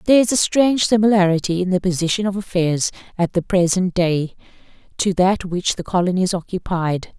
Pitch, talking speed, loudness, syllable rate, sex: 185 Hz, 165 wpm, -18 LUFS, 5.5 syllables/s, female